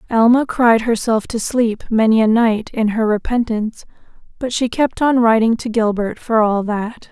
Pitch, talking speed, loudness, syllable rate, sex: 225 Hz, 175 wpm, -16 LUFS, 4.6 syllables/s, female